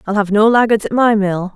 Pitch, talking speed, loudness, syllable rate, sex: 210 Hz, 270 wpm, -14 LUFS, 5.7 syllables/s, female